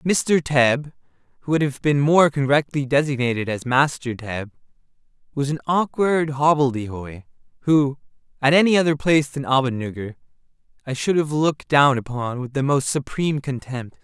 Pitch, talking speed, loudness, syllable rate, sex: 140 Hz, 135 wpm, -20 LUFS, 5.0 syllables/s, male